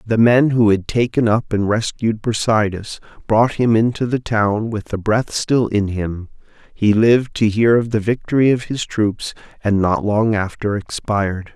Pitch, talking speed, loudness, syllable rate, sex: 110 Hz, 180 wpm, -17 LUFS, 4.4 syllables/s, male